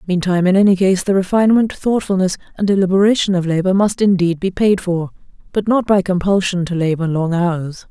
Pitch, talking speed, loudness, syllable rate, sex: 185 Hz, 180 wpm, -16 LUFS, 5.7 syllables/s, female